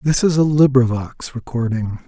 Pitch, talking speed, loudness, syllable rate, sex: 130 Hz, 145 wpm, -17 LUFS, 4.8 syllables/s, male